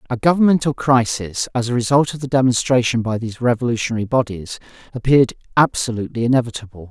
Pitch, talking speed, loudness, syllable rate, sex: 120 Hz, 140 wpm, -18 LUFS, 6.7 syllables/s, male